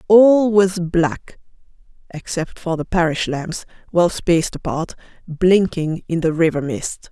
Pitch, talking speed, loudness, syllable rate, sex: 170 Hz, 135 wpm, -18 LUFS, 3.9 syllables/s, female